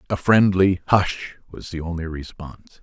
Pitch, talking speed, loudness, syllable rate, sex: 85 Hz, 150 wpm, -20 LUFS, 4.6 syllables/s, male